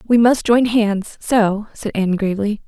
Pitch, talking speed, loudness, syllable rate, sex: 215 Hz, 155 wpm, -17 LUFS, 4.5 syllables/s, female